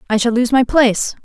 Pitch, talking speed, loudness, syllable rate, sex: 240 Hz, 240 wpm, -14 LUFS, 6.1 syllables/s, female